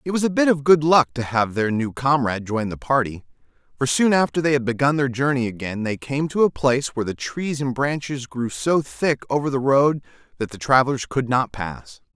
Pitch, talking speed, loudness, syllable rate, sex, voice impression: 135 Hz, 225 wpm, -21 LUFS, 5.4 syllables/s, male, very masculine, adult-like, thick, tensed, powerful, bright, slightly hard, clear, fluent, cool, very intellectual, refreshing, very sincere, calm, slightly mature, very friendly, reassuring, slightly unique, elegant, slightly wild, sweet, lively, kind, slightly intense